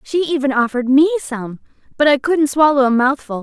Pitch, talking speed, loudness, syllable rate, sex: 275 Hz, 195 wpm, -15 LUFS, 5.7 syllables/s, female